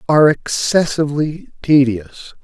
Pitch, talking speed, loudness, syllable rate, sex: 145 Hz, 75 wpm, -15 LUFS, 4.4 syllables/s, male